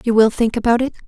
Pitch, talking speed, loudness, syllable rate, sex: 230 Hz, 280 wpm, -16 LUFS, 7.1 syllables/s, female